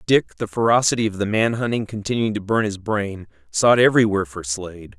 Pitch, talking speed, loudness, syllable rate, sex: 105 Hz, 195 wpm, -20 LUFS, 5.8 syllables/s, male